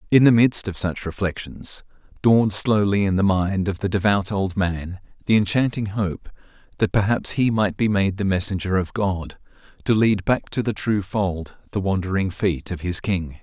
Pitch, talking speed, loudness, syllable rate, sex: 100 Hz, 190 wpm, -21 LUFS, 4.7 syllables/s, male